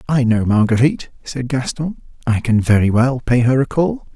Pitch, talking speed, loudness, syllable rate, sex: 130 Hz, 190 wpm, -17 LUFS, 5.1 syllables/s, male